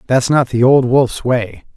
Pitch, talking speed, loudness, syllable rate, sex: 125 Hz, 205 wpm, -14 LUFS, 4.0 syllables/s, male